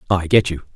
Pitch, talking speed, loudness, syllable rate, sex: 90 Hz, 240 wpm, -18 LUFS, 6.3 syllables/s, male